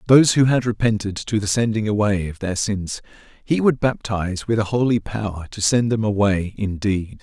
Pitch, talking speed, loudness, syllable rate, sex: 105 Hz, 190 wpm, -20 LUFS, 5.2 syllables/s, male